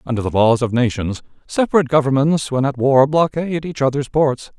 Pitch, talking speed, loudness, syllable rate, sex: 140 Hz, 185 wpm, -17 LUFS, 5.8 syllables/s, male